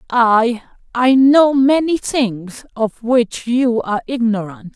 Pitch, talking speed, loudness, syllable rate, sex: 235 Hz, 115 wpm, -15 LUFS, 3.4 syllables/s, female